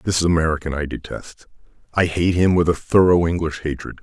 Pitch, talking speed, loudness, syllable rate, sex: 85 Hz, 210 wpm, -19 LUFS, 6.0 syllables/s, male